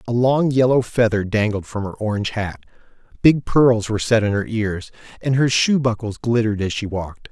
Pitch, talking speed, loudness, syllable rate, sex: 115 Hz, 195 wpm, -19 LUFS, 5.4 syllables/s, male